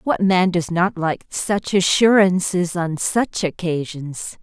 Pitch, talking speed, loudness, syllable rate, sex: 180 Hz, 135 wpm, -19 LUFS, 3.5 syllables/s, female